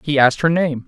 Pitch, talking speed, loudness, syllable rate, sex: 145 Hz, 275 wpm, -16 LUFS, 6.5 syllables/s, male